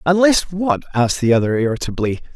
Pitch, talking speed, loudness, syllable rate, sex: 140 Hz, 155 wpm, -17 LUFS, 6.0 syllables/s, male